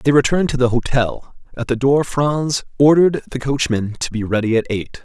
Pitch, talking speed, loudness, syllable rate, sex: 130 Hz, 200 wpm, -17 LUFS, 5.5 syllables/s, male